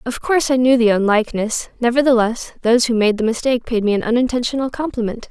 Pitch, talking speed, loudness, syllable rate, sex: 235 Hz, 190 wpm, -17 LUFS, 6.6 syllables/s, female